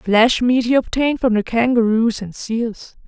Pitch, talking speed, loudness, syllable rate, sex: 235 Hz, 175 wpm, -17 LUFS, 4.4 syllables/s, female